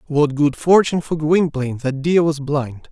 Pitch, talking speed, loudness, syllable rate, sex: 150 Hz, 185 wpm, -18 LUFS, 4.7 syllables/s, male